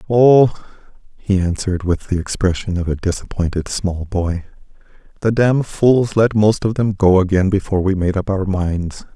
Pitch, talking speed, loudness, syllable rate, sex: 100 Hz, 170 wpm, -17 LUFS, 4.7 syllables/s, male